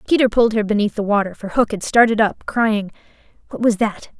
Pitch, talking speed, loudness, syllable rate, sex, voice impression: 215 Hz, 215 wpm, -18 LUFS, 6.0 syllables/s, female, feminine, slightly adult-like, slightly fluent, slightly intellectual, calm